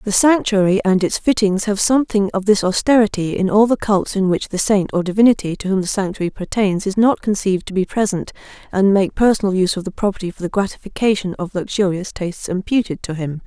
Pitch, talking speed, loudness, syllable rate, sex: 195 Hz, 210 wpm, -17 LUFS, 6.0 syllables/s, female